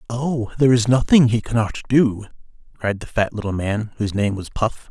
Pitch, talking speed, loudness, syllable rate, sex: 115 Hz, 195 wpm, -20 LUFS, 5.4 syllables/s, male